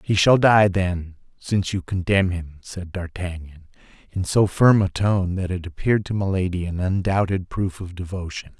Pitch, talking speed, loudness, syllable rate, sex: 95 Hz, 175 wpm, -21 LUFS, 4.8 syllables/s, male